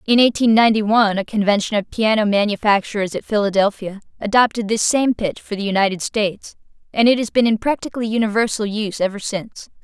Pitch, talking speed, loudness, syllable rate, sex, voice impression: 215 Hz, 175 wpm, -18 LUFS, 6.3 syllables/s, female, feminine, slightly young, tensed, fluent, intellectual, slightly sharp